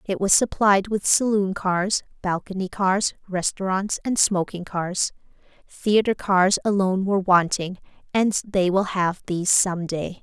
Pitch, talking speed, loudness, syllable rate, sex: 190 Hz, 140 wpm, -22 LUFS, 4.2 syllables/s, female